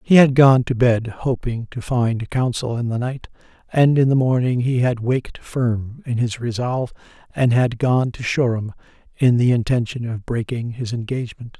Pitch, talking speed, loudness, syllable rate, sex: 120 Hz, 180 wpm, -20 LUFS, 4.8 syllables/s, male